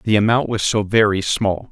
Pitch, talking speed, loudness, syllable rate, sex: 105 Hz, 210 wpm, -17 LUFS, 4.8 syllables/s, male